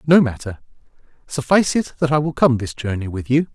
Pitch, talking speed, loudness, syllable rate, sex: 135 Hz, 205 wpm, -19 LUFS, 6.0 syllables/s, male